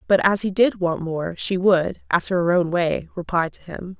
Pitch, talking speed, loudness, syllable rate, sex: 180 Hz, 225 wpm, -21 LUFS, 4.7 syllables/s, female